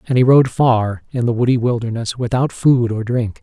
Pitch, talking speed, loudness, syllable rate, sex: 120 Hz, 210 wpm, -16 LUFS, 5.0 syllables/s, male